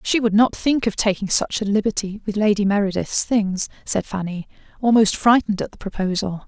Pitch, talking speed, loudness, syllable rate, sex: 205 Hz, 185 wpm, -20 LUFS, 5.5 syllables/s, female